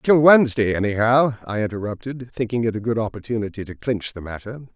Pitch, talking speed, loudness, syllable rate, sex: 115 Hz, 175 wpm, -21 LUFS, 6.1 syllables/s, male